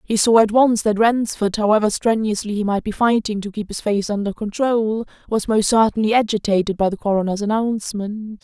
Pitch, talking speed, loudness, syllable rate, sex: 215 Hz, 185 wpm, -19 LUFS, 5.4 syllables/s, female